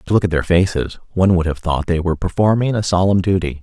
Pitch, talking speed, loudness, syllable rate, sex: 90 Hz, 250 wpm, -17 LUFS, 6.5 syllables/s, male